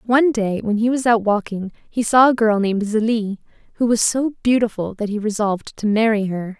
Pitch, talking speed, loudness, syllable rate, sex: 220 Hz, 210 wpm, -19 LUFS, 5.4 syllables/s, female